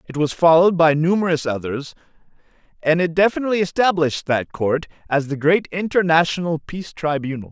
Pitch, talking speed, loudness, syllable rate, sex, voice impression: 165 Hz, 145 wpm, -19 LUFS, 5.9 syllables/s, male, masculine, adult-like, slightly relaxed, powerful, raspy, slightly friendly, wild, lively, strict, intense, sharp